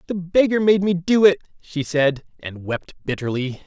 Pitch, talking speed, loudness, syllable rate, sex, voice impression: 160 Hz, 180 wpm, -20 LUFS, 4.4 syllables/s, male, masculine, adult-like, refreshing, slightly sincere, slightly lively